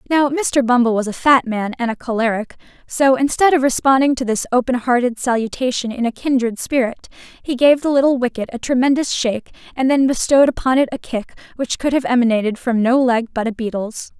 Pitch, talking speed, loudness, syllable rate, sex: 250 Hz, 205 wpm, -17 LUFS, 5.8 syllables/s, female